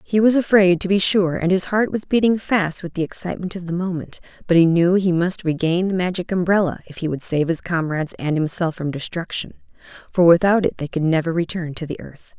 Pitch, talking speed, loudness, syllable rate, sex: 175 Hz, 230 wpm, -20 LUFS, 5.7 syllables/s, female